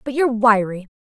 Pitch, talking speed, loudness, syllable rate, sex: 230 Hz, 175 wpm, -17 LUFS, 6.3 syllables/s, female